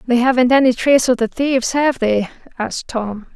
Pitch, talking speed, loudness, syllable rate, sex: 245 Hz, 195 wpm, -16 LUFS, 5.6 syllables/s, female